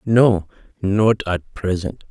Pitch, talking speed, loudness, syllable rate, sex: 100 Hz, 115 wpm, -19 LUFS, 3.1 syllables/s, male